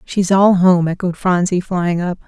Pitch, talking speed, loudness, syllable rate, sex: 180 Hz, 185 wpm, -15 LUFS, 4.3 syllables/s, female